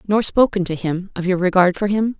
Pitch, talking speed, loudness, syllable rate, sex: 190 Hz, 220 wpm, -18 LUFS, 5.5 syllables/s, female